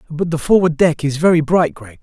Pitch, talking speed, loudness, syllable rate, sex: 160 Hz, 240 wpm, -15 LUFS, 5.5 syllables/s, male